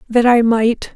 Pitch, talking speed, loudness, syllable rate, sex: 235 Hz, 190 wpm, -14 LUFS, 4.1 syllables/s, female